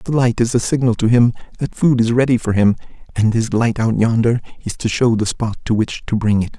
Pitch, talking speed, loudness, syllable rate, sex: 115 Hz, 255 wpm, -17 LUFS, 5.8 syllables/s, male